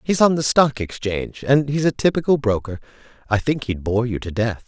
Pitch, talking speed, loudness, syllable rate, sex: 125 Hz, 220 wpm, -20 LUFS, 5.4 syllables/s, male